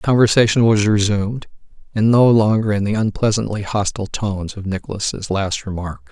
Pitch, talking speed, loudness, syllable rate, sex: 105 Hz, 155 wpm, -18 LUFS, 5.5 syllables/s, male